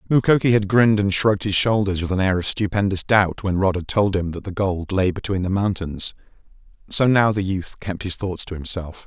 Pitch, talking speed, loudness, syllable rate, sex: 95 Hz, 225 wpm, -20 LUFS, 5.5 syllables/s, male